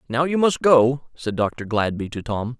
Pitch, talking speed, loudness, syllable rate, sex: 125 Hz, 210 wpm, -21 LUFS, 4.2 syllables/s, male